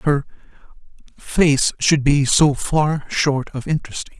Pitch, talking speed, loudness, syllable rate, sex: 145 Hz, 130 wpm, -18 LUFS, 3.8 syllables/s, male